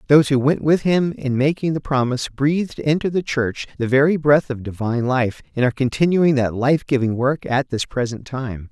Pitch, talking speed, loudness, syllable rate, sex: 135 Hz, 205 wpm, -19 LUFS, 5.4 syllables/s, male